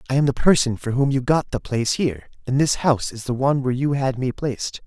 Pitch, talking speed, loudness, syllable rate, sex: 130 Hz, 270 wpm, -21 LUFS, 6.5 syllables/s, male